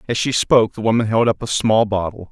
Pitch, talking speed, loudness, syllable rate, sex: 110 Hz, 260 wpm, -17 LUFS, 6.1 syllables/s, male